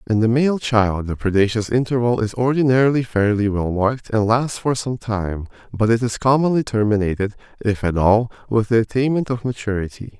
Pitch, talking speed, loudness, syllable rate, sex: 115 Hz, 175 wpm, -19 LUFS, 5.4 syllables/s, male